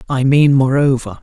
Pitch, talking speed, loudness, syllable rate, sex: 135 Hz, 145 wpm, -13 LUFS, 4.8 syllables/s, male